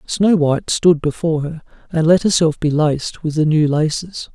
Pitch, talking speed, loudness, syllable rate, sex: 160 Hz, 195 wpm, -16 LUFS, 5.1 syllables/s, male